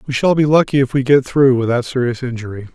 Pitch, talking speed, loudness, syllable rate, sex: 130 Hz, 240 wpm, -15 LUFS, 6.2 syllables/s, male